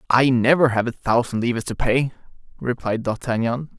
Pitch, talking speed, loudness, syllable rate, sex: 120 Hz, 160 wpm, -21 LUFS, 5.3 syllables/s, male